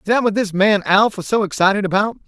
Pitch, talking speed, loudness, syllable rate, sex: 205 Hz, 265 wpm, -16 LUFS, 6.1 syllables/s, male